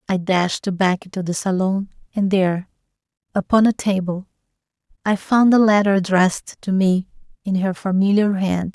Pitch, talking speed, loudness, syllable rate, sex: 190 Hz, 150 wpm, -19 LUFS, 4.9 syllables/s, female